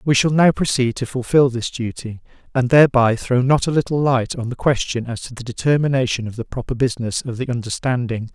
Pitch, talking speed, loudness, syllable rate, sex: 125 Hz, 210 wpm, -19 LUFS, 5.8 syllables/s, male